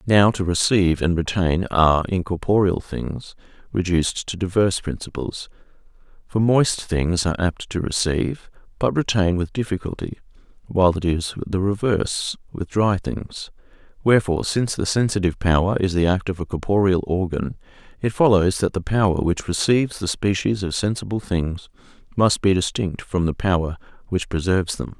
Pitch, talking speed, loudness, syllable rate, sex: 95 Hz, 155 wpm, -21 LUFS, 5.2 syllables/s, male